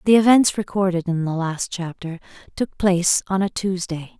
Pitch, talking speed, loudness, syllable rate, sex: 185 Hz, 170 wpm, -20 LUFS, 5.0 syllables/s, female